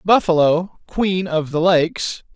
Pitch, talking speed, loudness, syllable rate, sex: 175 Hz, 130 wpm, -18 LUFS, 3.8 syllables/s, male